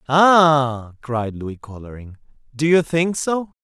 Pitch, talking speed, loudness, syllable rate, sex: 140 Hz, 130 wpm, -18 LUFS, 3.4 syllables/s, male